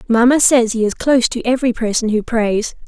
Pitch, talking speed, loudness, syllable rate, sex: 235 Hz, 210 wpm, -15 LUFS, 5.7 syllables/s, female